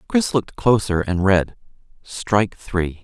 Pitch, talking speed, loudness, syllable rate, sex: 100 Hz, 140 wpm, -19 LUFS, 4.2 syllables/s, male